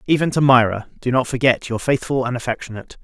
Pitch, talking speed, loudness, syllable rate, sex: 125 Hz, 200 wpm, -18 LUFS, 6.6 syllables/s, male